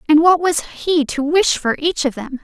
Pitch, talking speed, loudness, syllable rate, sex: 305 Hz, 245 wpm, -16 LUFS, 4.5 syllables/s, female